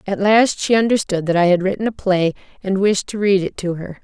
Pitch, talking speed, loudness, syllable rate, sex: 190 Hz, 255 wpm, -17 LUFS, 5.6 syllables/s, female